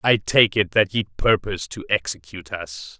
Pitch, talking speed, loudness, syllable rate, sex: 95 Hz, 180 wpm, -21 LUFS, 5.2 syllables/s, male